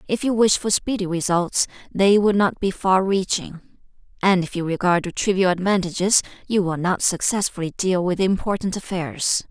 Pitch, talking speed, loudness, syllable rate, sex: 190 Hz, 165 wpm, -21 LUFS, 4.9 syllables/s, female